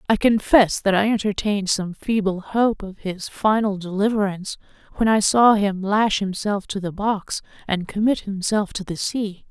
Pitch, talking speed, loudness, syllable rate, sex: 205 Hz, 170 wpm, -21 LUFS, 4.6 syllables/s, female